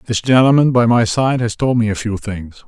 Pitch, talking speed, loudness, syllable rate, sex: 115 Hz, 245 wpm, -15 LUFS, 5.3 syllables/s, male